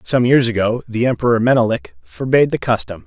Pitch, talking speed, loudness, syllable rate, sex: 115 Hz, 175 wpm, -16 LUFS, 5.9 syllables/s, male